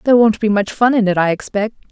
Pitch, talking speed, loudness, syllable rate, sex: 215 Hz, 280 wpm, -15 LUFS, 6.6 syllables/s, female